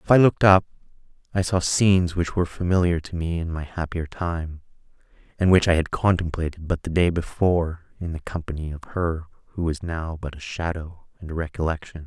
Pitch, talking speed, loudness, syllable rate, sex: 85 Hz, 195 wpm, -23 LUFS, 5.7 syllables/s, male